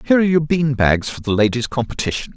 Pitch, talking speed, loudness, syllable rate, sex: 130 Hz, 230 wpm, -18 LUFS, 6.7 syllables/s, male